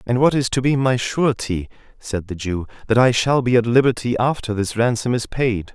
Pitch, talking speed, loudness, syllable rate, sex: 120 Hz, 220 wpm, -19 LUFS, 5.3 syllables/s, male